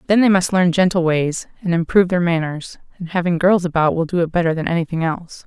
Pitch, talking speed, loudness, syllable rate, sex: 175 Hz, 240 wpm, -18 LUFS, 6.2 syllables/s, female